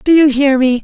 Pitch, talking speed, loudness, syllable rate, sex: 275 Hz, 285 wpm, -11 LUFS, 5.1 syllables/s, female